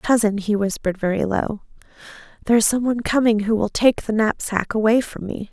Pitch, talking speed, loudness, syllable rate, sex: 215 Hz, 185 wpm, -20 LUFS, 5.8 syllables/s, female